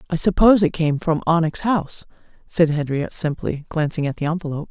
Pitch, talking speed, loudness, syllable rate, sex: 160 Hz, 180 wpm, -20 LUFS, 6.2 syllables/s, female